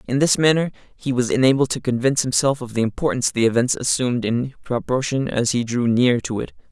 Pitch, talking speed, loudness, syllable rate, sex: 125 Hz, 205 wpm, -20 LUFS, 6.0 syllables/s, male